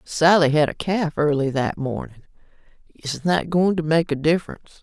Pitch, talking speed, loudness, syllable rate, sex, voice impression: 160 Hz, 175 wpm, -21 LUFS, 5.3 syllables/s, female, slightly masculine, adult-like, slightly dark, slightly calm, unique